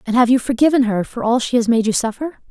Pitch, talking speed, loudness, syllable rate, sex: 240 Hz, 290 wpm, -17 LUFS, 6.5 syllables/s, female